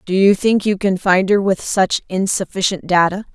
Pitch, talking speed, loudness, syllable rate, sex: 190 Hz, 195 wpm, -16 LUFS, 4.9 syllables/s, female